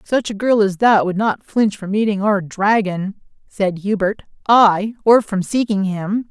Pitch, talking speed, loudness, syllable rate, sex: 205 Hz, 180 wpm, -17 LUFS, 4.1 syllables/s, female